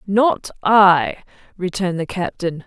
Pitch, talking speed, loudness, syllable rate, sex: 185 Hz, 110 wpm, -18 LUFS, 4.0 syllables/s, female